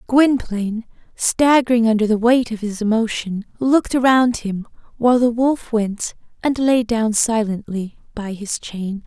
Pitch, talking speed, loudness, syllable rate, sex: 230 Hz, 145 wpm, -18 LUFS, 4.4 syllables/s, female